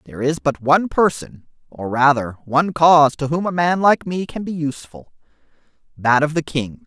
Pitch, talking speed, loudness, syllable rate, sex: 145 Hz, 185 wpm, -18 LUFS, 5.4 syllables/s, male